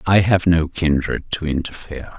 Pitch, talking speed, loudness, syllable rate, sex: 80 Hz, 165 wpm, -19 LUFS, 4.9 syllables/s, male